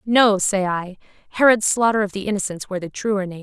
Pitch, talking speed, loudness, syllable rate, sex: 200 Hz, 210 wpm, -19 LUFS, 5.7 syllables/s, female